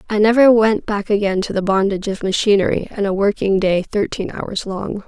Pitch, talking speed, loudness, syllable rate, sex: 205 Hz, 200 wpm, -17 LUFS, 5.4 syllables/s, female